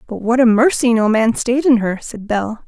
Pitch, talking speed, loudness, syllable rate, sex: 235 Hz, 245 wpm, -15 LUFS, 4.9 syllables/s, female